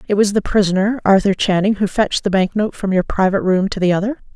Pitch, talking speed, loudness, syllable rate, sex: 200 Hz, 250 wpm, -16 LUFS, 6.5 syllables/s, female